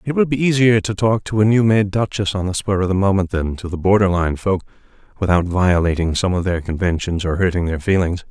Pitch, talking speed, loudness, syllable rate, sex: 95 Hz, 230 wpm, -18 LUFS, 5.9 syllables/s, male